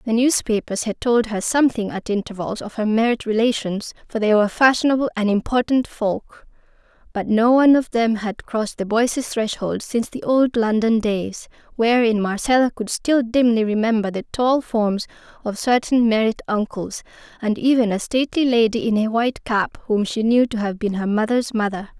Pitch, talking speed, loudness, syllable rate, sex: 225 Hz, 175 wpm, -20 LUFS, 5.2 syllables/s, female